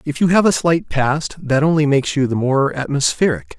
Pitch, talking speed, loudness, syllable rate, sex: 145 Hz, 215 wpm, -17 LUFS, 5.4 syllables/s, male